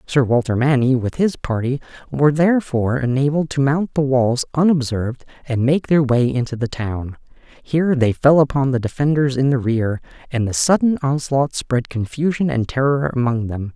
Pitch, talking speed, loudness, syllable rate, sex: 135 Hz, 175 wpm, -18 LUFS, 5.1 syllables/s, male